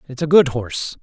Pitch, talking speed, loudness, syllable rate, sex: 135 Hz, 235 wpm, -17 LUFS, 5.9 syllables/s, male